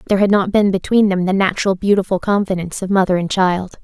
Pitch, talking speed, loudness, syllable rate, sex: 190 Hz, 220 wpm, -16 LUFS, 6.6 syllables/s, female